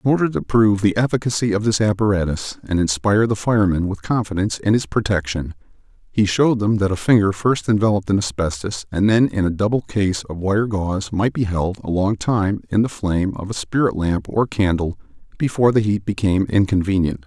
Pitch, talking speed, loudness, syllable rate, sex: 100 Hz, 200 wpm, -19 LUFS, 5.9 syllables/s, male